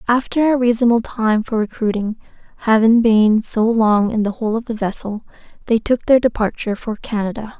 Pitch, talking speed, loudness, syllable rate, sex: 225 Hz, 175 wpm, -17 LUFS, 5.4 syllables/s, female